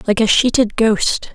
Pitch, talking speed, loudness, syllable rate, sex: 225 Hz, 180 wpm, -15 LUFS, 4.2 syllables/s, female